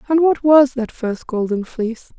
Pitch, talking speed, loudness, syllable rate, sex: 255 Hz, 190 wpm, -17 LUFS, 4.6 syllables/s, female